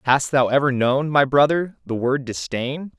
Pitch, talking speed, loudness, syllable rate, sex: 135 Hz, 180 wpm, -20 LUFS, 4.4 syllables/s, male